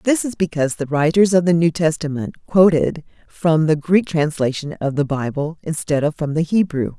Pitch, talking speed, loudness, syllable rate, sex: 160 Hz, 190 wpm, -18 LUFS, 5.0 syllables/s, female